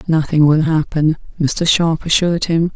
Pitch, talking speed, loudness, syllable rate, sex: 160 Hz, 155 wpm, -15 LUFS, 4.6 syllables/s, female